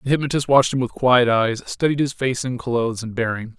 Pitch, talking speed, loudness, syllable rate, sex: 125 Hz, 235 wpm, -20 LUFS, 5.8 syllables/s, male